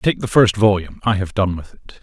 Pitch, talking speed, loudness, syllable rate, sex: 100 Hz, 240 wpm, -17 LUFS, 5.8 syllables/s, male